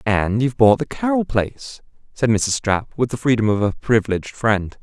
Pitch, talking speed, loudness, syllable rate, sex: 115 Hz, 200 wpm, -19 LUFS, 5.3 syllables/s, male